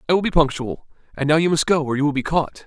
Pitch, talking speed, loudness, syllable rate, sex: 150 Hz, 315 wpm, -20 LUFS, 6.8 syllables/s, male